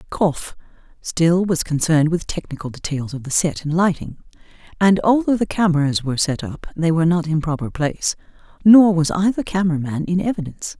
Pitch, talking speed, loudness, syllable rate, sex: 170 Hz, 180 wpm, -19 LUFS, 5.7 syllables/s, female